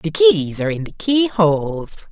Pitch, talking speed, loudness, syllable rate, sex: 185 Hz, 170 wpm, -17 LUFS, 4.4 syllables/s, male